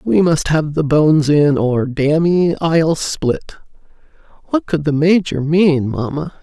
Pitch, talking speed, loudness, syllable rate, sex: 155 Hz, 150 wpm, -15 LUFS, 3.8 syllables/s, female